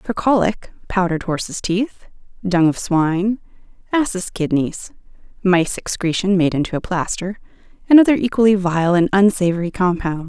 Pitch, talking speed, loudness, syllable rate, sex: 190 Hz, 135 wpm, -18 LUFS, 5.0 syllables/s, female